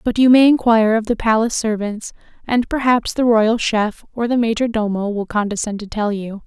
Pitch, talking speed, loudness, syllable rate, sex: 220 Hz, 195 wpm, -17 LUFS, 5.3 syllables/s, female